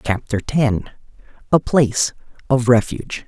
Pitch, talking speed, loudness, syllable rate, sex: 120 Hz, 110 wpm, -18 LUFS, 4.7 syllables/s, male